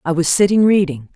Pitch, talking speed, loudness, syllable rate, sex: 175 Hz, 205 wpm, -15 LUFS, 5.8 syllables/s, female